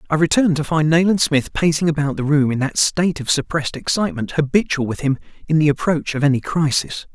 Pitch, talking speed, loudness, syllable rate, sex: 155 Hz, 210 wpm, -18 LUFS, 6.2 syllables/s, male